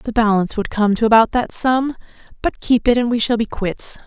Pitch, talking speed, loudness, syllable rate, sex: 230 Hz, 235 wpm, -17 LUFS, 5.4 syllables/s, female